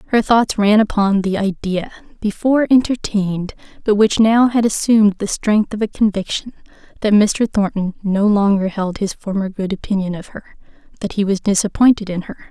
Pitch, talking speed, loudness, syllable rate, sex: 205 Hz, 170 wpm, -17 LUFS, 5.2 syllables/s, female